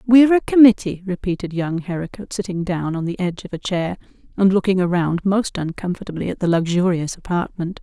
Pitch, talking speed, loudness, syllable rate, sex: 185 Hz, 175 wpm, -19 LUFS, 5.9 syllables/s, female